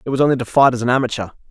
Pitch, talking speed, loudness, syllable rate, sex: 125 Hz, 320 wpm, -17 LUFS, 8.7 syllables/s, male